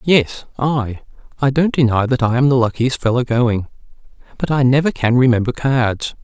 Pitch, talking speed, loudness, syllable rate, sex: 125 Hz, 165 wpm, -16 LUFS, 4.7 syllables/s, male